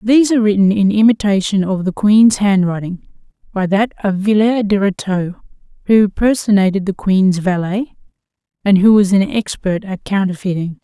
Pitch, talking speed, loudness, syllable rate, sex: 200 Hz, 145 wpm, -14 LUFS, 5.0 syllables/s, female